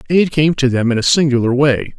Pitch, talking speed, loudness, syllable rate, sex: 135 Hz, 240 wpm, -14 LUFS, 5.7 syllables/s, male